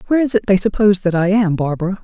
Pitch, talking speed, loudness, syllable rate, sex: 195 Hz, 265 wpm, -16 LUFS, 7.8 syllables/s, female